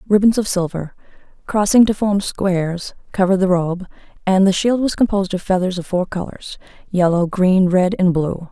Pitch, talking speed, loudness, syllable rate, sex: 190 Hz, 175 wpm, -17 LUFS, 5.1 syllables/s, female